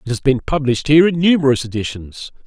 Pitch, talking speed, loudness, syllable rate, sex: 135 Hz, 195 wpm, -16 LUFS, 6.9 syllables/s, male